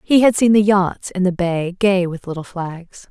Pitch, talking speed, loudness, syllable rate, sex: 185 Hz, 230 wpm, -17 LUFS, 4.4 syllables/s, female